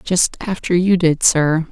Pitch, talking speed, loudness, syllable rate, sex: 170 Hz, 175 wpm, -16 LUFS, 3.8 syllables/s, female